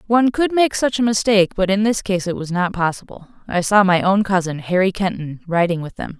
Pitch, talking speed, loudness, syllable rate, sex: 195 Hz, 235 wpm, -18 LUFS, 5.7 syllables/s, female